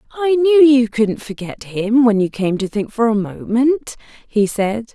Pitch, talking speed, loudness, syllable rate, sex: 235 Hz, 195 wpm, -16 LUFS, 4.2 syllables/s, female